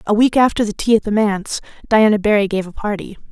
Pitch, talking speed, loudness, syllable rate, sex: 210 Hz, 235 wpm, -16 LUFS, 6.4 syllables/s, female